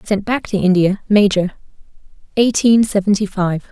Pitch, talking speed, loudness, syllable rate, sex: 200 Hz, 130 wpm, -16 LUFS, 4.9 syllables/s, female